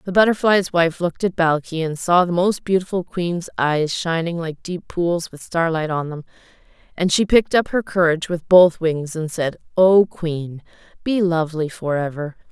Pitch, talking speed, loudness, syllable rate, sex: 170 Hz, 180 wpm, -19 LUFS, 4.8 syllables/s, female